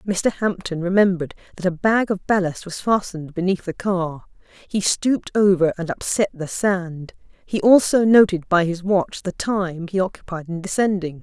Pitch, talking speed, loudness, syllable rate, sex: 185 Hz, 170 wpm, -20 LUFS, 4.9 syllables/s, female